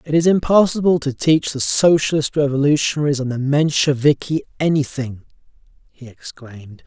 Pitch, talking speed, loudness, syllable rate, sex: 145 Hz, 120 wpm, -17 LUFS, 5.2 syllables/s, male